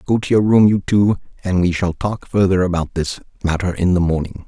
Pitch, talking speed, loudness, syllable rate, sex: 95 Hz, 230 wpm, -17 LUFS, 5.5 syllables/s, male